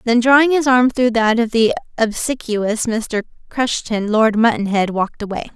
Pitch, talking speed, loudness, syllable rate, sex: 230 Hz, 160 wpm, -17 LUFS, 4.7 syllables/s, female